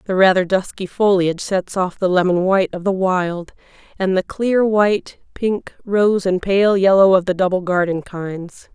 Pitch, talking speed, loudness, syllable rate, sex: 190 Hz, 180 wpm, -17 LUFS, 4.6 syllables/s, female